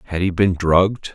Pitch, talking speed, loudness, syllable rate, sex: 90 Hz, 210 wpm, -18 LUFS, 5.5 syllables/s, male